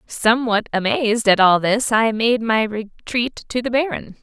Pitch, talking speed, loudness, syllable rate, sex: 225 Hz, 170 wpm, -18 LUFS, 4.5 syllables/s, female